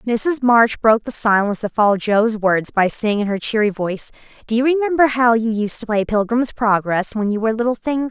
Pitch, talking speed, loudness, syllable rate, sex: 225 Hz, 220 wpm, -17 LUFS, 5.7 syllables/s, female